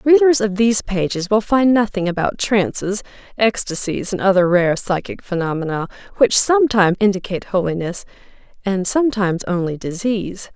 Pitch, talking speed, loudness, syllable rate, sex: 200 Hz, 130 wpm, -18 LUFS, 5.5 syllables/s, female